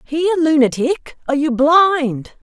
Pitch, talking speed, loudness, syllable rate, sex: 295 Hz, 120 wpm, -16 LUFS, 4.4 syllables/s, female